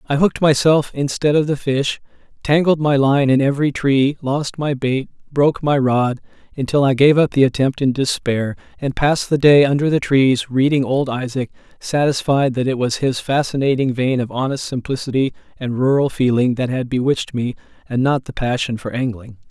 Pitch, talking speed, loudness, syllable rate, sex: 135 Hz, 185 wpm, -17 LUFS, 5.2 syllables/s, male